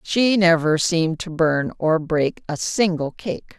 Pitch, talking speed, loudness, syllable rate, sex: 170 Hz, 165 wpm, -20 LUFS, 3.9 syllables/s, female